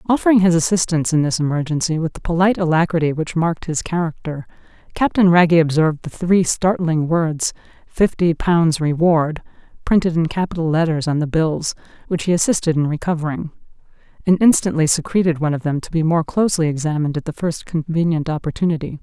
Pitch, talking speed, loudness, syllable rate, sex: 165 Hz, 165 wpm, -18 LUFS, 6.0 syllables/s, female